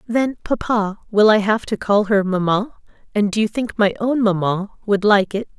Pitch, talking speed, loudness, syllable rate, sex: 210 Hz, 205 wpm, -18 LUFS, 4.7 syllables/s, female